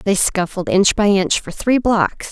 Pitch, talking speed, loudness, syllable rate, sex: 200 Hz, 205 wpm, -16 LUFS, 4.1 syllables/s, female